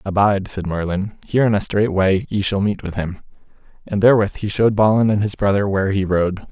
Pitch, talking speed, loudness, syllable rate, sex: 100 Hz, 220 wpm, -18 LUFS, 6.1 syllables/s, male